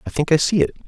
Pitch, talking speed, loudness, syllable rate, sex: 155 Hz, 345 wpm, -18 LUFS, 7.5 syllables/s, male